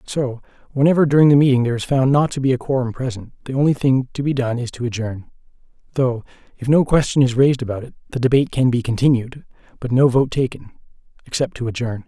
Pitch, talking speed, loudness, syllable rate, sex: 130 Hz, 210 wpm, -18 LUFS, 6.7 syllables/s, male